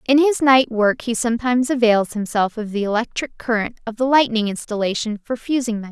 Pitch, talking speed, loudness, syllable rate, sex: 230 Hz, 195 wpm, -19 LUFS, 5.8 syllables/s, female